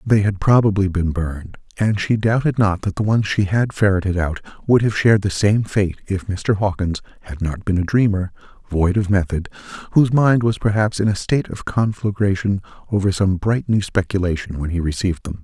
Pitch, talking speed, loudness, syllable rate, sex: 100 Hz, 200 wpm, -19 LUFS, 5.5 syllables/s, male